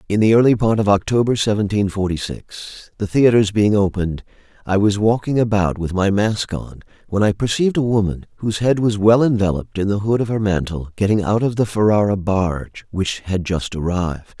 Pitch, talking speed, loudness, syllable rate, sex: 100 Hz, 195 wpm, -18 LUFS, 5.6 syllables/s, male